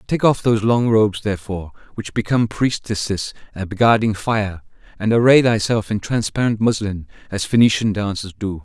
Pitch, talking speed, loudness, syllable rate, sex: 105 Hz, 145 wpm, -18 LUFS, 5.2 syllables/s, male